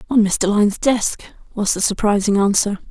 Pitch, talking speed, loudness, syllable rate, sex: 210 Hz, 165 wpm, -17 LUFS, 5.3 syllables/s, female